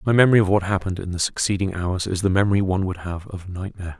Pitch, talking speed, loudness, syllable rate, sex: 95 Hz, 255 wpm, -22 LUFS, 7.2 syllables/s, male